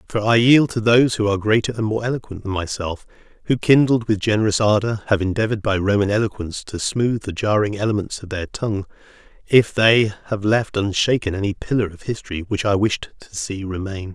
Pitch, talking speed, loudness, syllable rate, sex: 105 Hz, 195 wpm, -20 LUFS, 6.0 syllables/s, male